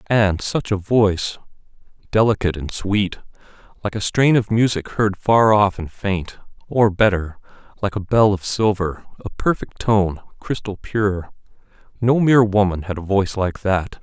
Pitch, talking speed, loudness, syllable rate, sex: 100 Hz, 155 wpm, -19 LUFS, 4.6 syllables/s, male